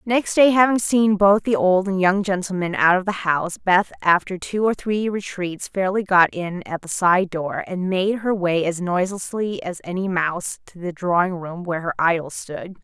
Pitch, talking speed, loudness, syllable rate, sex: 185 Hz, 205 wpm, -20 LUFS, 4.7 syllables/s, female